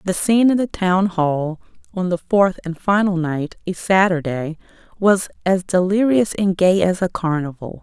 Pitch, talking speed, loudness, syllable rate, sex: 185 Hz, 170 wpm, -18 LUFS, 4.5 syllables/s, female